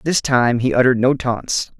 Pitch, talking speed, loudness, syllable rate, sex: 125 Hz, 200 wpm, -17 LUFS, 4.9 syllables/s, male